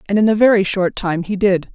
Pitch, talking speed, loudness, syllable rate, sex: 195 Hz, 275 wpm, -16 LUFS, 5.5 syllables/s, female